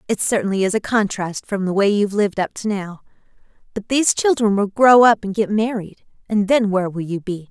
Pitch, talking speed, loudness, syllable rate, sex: 205 Hz, 225 wpm, -18 LUFS, 5.8 syllables/s, female